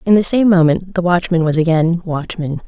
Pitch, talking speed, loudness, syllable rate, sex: 175 Hz, 200 wpm, -15 LUFS, 5.2 syllables/s, female